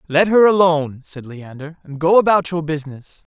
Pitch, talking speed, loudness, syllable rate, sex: 160 Hz, 180 wpm, -15 LUFS, 5.4 syllables/s, male